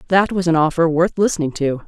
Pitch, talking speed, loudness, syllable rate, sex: 170 Hz, 225 wpm, -17 LUFS, 6.0 syllables/s, female